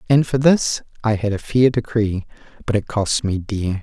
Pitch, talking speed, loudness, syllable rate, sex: 110 Hz, 205 wpm, -19 LUFS, 4.6 syllables/s, male